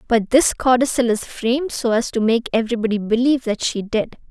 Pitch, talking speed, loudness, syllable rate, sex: 235 Hz, 195 wpm, -19 LUFS, 5.7 syllables/s, female